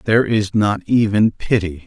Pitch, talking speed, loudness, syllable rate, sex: 105 Hz, 160 wpm, -17 LUFS, 4.6 syllables/s, male